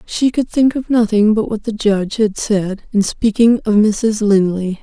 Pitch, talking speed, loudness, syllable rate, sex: 215 Hz, 200 wpm, -15 LUFS, 4.4 syllables/s, female